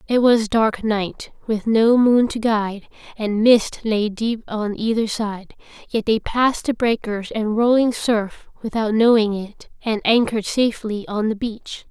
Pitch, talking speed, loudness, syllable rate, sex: 220 Hz, 165 wpm, -19 LUFS, 4.2 syllables/s, female